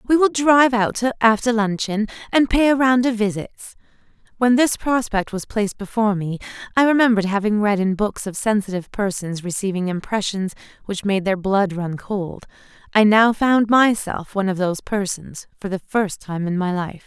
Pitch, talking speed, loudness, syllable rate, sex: 210 Hz, 180 wpm, -19 LUFS, 5.1 syllables/s, female